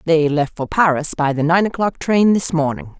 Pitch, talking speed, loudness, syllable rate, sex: 160 Hz, 220 wpm, -17 LUFS, 4.9 syllables/s, female